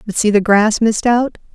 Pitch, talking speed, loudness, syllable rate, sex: 220 Hz, 235 wpm, -14 LUFS, 5.5 syllables/s, female